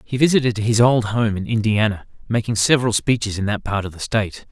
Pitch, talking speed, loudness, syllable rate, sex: 110 Hz, 215 wpm, -19 LUFS, 6.0 syllables/s, male